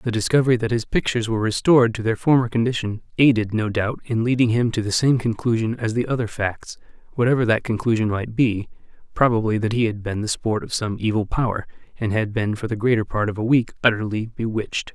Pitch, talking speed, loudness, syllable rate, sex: 115 Hz, 210 wpm, -21 LUFS, 6.1 syllables/s, male